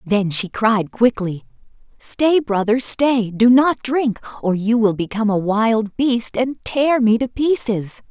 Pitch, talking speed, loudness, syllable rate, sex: 230 Hz, 165 wpm, -18 LUFS, 3.6 syllables/s, female